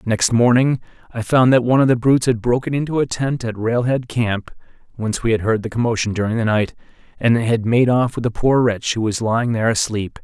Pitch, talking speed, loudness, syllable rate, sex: 115 Hz, 215 wpm, -18 LUFS, 5.8 syllables/s, male